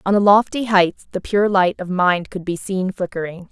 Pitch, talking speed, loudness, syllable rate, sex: 190 Hz, 220 wpm, -18 LUFS, 4.8 syllables/s, female